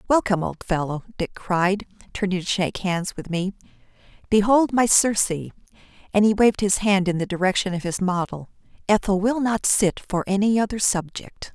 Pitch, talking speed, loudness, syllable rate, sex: 195 Hz, 170 wpm, -22 LUFS, 5.3 syllables/s, female